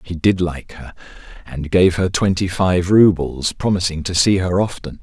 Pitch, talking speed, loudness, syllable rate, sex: 90 Hz, 180 wpm, -17 LUFS, 4.5 syllables/s, male